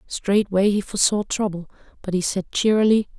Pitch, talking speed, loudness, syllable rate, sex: 200 Hz, 130 wpm, -21 LUFS, 5.4 syllables/s, female